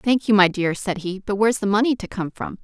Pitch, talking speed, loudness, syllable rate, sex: 205 Hz, 295 wpm, -21 LUFS, 5.9 syllables/s, female